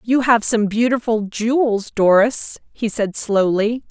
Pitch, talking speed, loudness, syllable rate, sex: 220 Hz, 140 wpm, -18 LUFS, 3.9 syllables/s, female